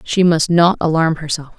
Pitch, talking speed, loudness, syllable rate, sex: 160 Hz, 190 wpm, -15 LUFS, 4.9 syllables/s, female